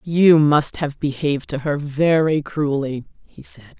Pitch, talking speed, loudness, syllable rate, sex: 145 Hz, 160 wpm, -19 LUFS, 4.2 syllables/s, female